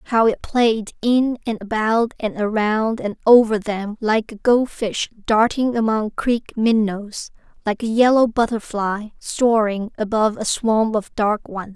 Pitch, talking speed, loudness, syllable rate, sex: 220 Hz, 150 wpm, -19 LUFS, 3.9 syllables/s, female